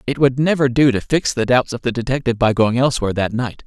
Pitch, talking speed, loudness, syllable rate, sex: 125 Hz, 260 wpm, -17 LUFS, 6.6 syllables/s, male